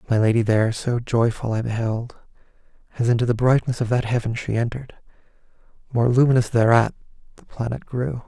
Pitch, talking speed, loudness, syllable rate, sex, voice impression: 120 Hz, 160 wpm, -21 LUFS, 5.8 syllables/s, male, masculine, very adult-like, middle-aged, very relaxed, very weak, dark, very soft, muffled, slightly halting, slightly raspy, cool, very intellectual, slightly refreshing, very sincere, very calm, slightly mature, friendly, very reassuring, very unique, very elegant, wild, very sweet, very kind, very modest